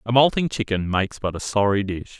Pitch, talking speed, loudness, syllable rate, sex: 105 Hz, 220 wpm, -22 LUFS, 5.7 syllables/s, male